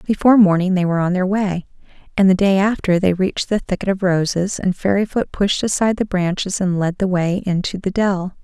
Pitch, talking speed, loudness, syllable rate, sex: 190 Hz, 215 wpm, -18 LUFS, 5.7 syllables/s, female